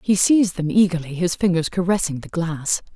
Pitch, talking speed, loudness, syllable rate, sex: 175 Hz, 185 wpm, -20 LUFS, 5.8 syllables/s, female